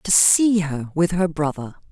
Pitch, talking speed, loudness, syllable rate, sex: 165 Hz, 190 wpm, -19 LUFS, 4.1 syllables/s, female